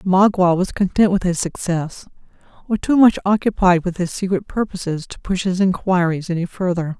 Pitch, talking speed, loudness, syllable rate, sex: 185 Hz, 170 wpm, -18 LUFS, 5.1 syllables/s, female